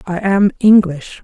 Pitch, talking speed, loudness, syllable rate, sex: 190 Hz, 145 wpm, -12 LUFS, 4.0 syllables/s, female